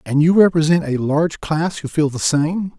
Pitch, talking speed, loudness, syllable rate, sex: 155 Hz, 215 wpm, -17 LUFS, 4.9 syllables/s, male